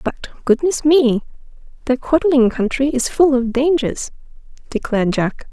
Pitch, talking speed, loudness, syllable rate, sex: 265 Hz, 110 wpm, -17 LUFS, 4.3 syllables/s, female